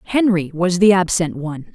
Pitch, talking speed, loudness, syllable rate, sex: 180 Hz, 170 wpm, -17 LUFS, 5.1 syllables/s, female